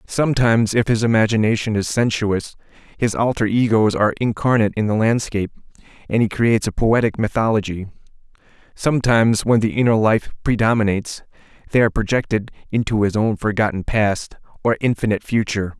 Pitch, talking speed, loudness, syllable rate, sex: 110 Hz, 140 wpm, -19 LUFS, 6.1 syllables/s, male